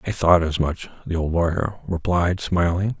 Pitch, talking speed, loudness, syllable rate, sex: 85 Hz, 180 wpm, -21 LUFS, 4.6 syllables/s, male